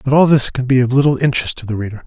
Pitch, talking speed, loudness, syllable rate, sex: 130 Hz, 320 wpm, -15 LUFS, 7.6 syllables/s, male